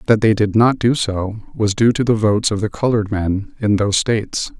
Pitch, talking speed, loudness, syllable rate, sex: 105 Hz, 235 wpm, -17 LUFS, 5.5 syllables/s, male